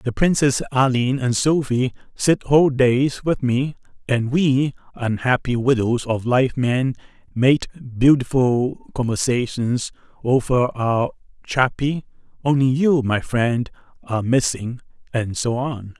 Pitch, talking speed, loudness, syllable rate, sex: 125 Hz, 120 wpm, -20 LUFS, 4.0 syllables/s, male